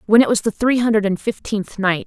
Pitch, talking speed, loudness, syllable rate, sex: 210 Hz, 260 wpm, -18 LUFS, 5.7 syllables/s, female